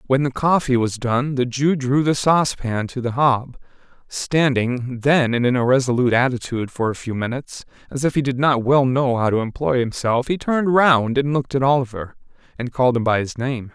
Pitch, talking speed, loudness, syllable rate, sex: 130 Hz, 205 wpm, -19 LUFS, 5.4 syllables/s, male